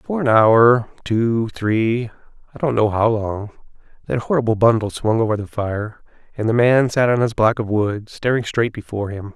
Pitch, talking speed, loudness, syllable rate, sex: 115 Hz, 180 wpm, -18 LUFS, 4.8 syllables/s, male